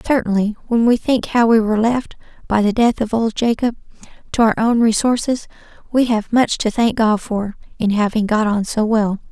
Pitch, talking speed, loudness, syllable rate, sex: 225 Hz, 200 wpm, -17 LUFS, 5.1 syllables/s, female